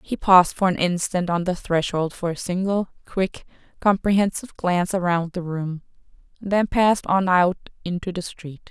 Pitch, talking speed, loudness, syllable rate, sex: 180 Hz, 160 wpm, -22 LUFS, 5.0 syllables/s, female